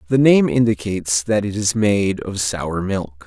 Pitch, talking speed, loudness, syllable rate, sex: 100 Hz, 185 wpm, -18 LUFS, 4.3 syllables/s, male